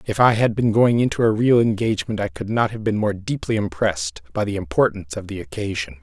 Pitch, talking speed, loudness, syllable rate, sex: 110 Hz, 230 wpm, -21 LUFS, 6.1 syllables/s, male